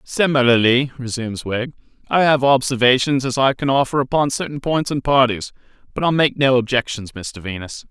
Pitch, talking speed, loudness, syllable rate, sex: 130 Hz, 165 wpm, -18 LUFS, 5.3 syllables/s, male